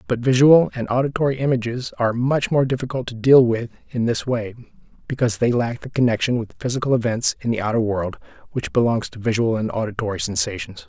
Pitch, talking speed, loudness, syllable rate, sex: 120 Hz, 190 wpm, -20 LUFS, 6.1 syllables/s, male